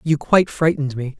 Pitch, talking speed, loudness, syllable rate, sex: 150 Hz, 200 wpm, -18 LUFS, 6.4 syllables/s, male